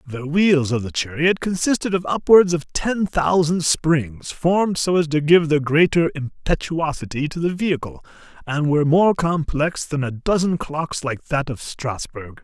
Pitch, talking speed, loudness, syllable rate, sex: 155 Hz, 170 wpm, -20 LUFS, 4.4 syllables/s, male